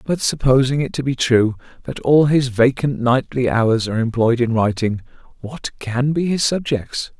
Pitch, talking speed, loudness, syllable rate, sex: 125 Hz, 175 wpm, -18 LUFS, 4.6 syllables/s, male